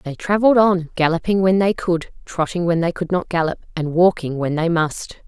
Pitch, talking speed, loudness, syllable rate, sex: 175 Hz, 205 wpm, -19 LUFS, 5.2 syllables/s, female